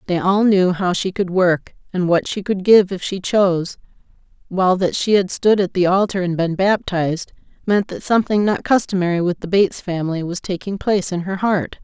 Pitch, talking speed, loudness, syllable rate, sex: 185 Hz, 210 wpm, -18 LUFS, 5.4 syllables/s, female